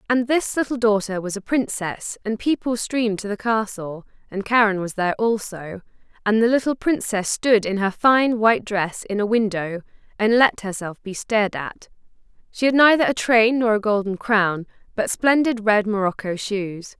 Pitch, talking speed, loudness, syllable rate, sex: 215 Hz, 180 wpm, -20 LUFS, 4.8 syllables/s, female